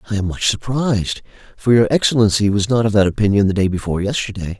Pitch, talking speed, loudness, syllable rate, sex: 105 Hz, 210 wpm, -17 LUFS, 6.7 syllables/s, male